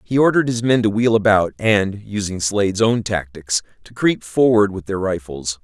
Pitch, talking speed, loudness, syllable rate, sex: 105 Hz, 190 wpm, -18 LUFS, 5.0 syllables/s, male